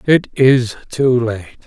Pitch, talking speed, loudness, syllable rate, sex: 125 Hz, 145 wpm, -15 LUFS, 3.6 syllables/s, male